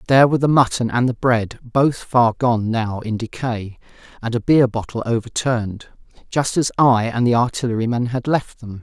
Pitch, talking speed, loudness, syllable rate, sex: 120 Hz, 185 wpm, -19 LUFS, 5.1 syllables/s, male